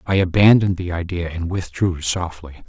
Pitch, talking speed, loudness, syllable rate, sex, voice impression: 90 Hz, 155 wpm, -19 LUFS, 5.3 syllables/s, male, very masculine, middle-aged, slightly thick, intellectual, calm, mature, reassuring